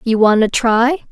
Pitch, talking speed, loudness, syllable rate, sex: 235 Hz, 215 wpm, -13 LUFS, 4.4 syllables/s, female